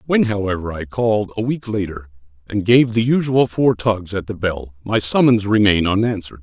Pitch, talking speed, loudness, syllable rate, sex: 105 Hz, 185 wpm, -18 LUFS, 5.4 syllables/s, male